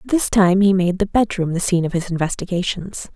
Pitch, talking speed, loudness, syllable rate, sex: 185 Hz, 210 wpm, -18 LUFS, 5.6 syllables/s, female